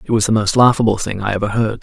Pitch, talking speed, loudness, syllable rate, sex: 110 Hz, 295 wpm, -16 LUFS, 6.7 syllables/s, male